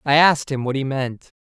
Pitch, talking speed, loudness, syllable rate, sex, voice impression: 140 Hz, 245 wpm, -20 LUFS, 5.7 syllables/s, male, masculine, adult-like, slightly cool, refreshing, sincere, friendly